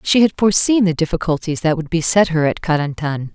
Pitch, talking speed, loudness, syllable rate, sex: 170 Hz, 195 wpm, -17 LUFS, 6.0 syllables/s, female